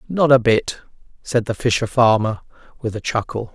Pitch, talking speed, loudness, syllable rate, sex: 115 Hz, 170 wpm, -18 LUFS, 5.1 syllables/s, male